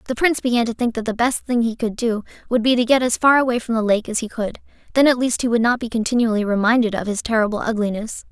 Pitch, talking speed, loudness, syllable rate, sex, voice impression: 230 Hz, 275 wpm, -19 LUFS, 6.7 syllables/s, female, feminine, slightly young, slightly bright, cute, slightly refreshing, friendly